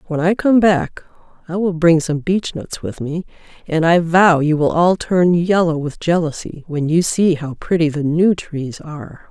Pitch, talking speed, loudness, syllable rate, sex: 165 Hz, 200 wpm, -17 LUFS, 4.4 syllables/s, female